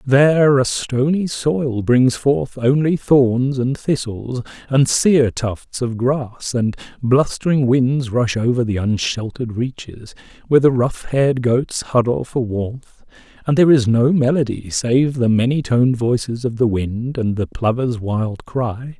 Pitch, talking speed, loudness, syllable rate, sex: 125 Hz, 155 wpm, -18 LUFS, 4.1 syllables/s, male